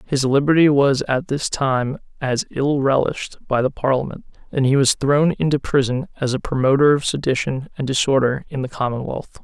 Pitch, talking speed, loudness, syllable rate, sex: 135 Hz, 180 wpm, -19 LUFS, 5.2 syllables/s, male